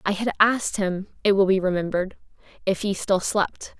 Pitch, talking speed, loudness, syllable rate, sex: 195 Hz, 190 wpm, -23 LUFS, 5.3 syllables/s, female